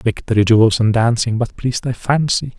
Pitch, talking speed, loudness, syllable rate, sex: 115 Hz, 185 wpm, -16 LUFS, 5.5 syllables/s, male